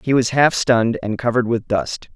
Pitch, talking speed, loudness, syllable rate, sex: 120 Hz, 220 wpm, -18 LUFS, 5.4 syllables/s, male